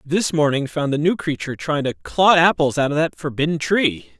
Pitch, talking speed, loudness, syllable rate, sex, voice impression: 155 Hz, 215 wpm, -19 LUFS, 5.2 syllables/s, male, masculine, middle-aged, powerful, bright, raspy, friendly, unique, wild, lively, intense